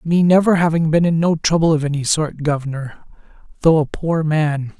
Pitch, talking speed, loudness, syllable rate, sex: 155 Hz, 175 wpm, -17 LUFS, 5.0 syllables/s, male